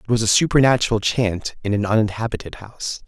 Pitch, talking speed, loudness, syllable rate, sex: 110 Hz, 175 wpm, -19 LUFS, 6.3 syllables/s, male